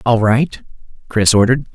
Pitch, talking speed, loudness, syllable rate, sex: 120 Hz, 140 wpm, -14 LUFS, 5.2 syllables/s, male